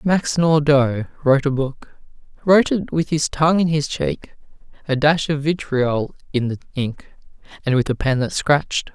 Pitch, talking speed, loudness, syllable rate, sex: 145 Hz, 170 wpm, -19 LUFS, 4.8 syllables/s, male